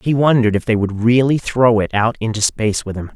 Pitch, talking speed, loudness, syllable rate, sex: 115 Hz, 245 wpm, -16 LUFS, 6.0 syllables/s, male